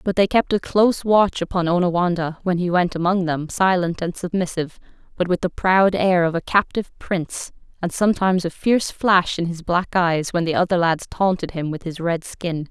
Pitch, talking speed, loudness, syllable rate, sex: 180 Hz, 210 wpm, -20 LUFS, 5.3 syllables/s, female